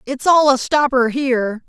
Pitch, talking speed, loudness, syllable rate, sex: 260 Hz, 180 wpm, -16 LUFS, 4.7 syllables/s, female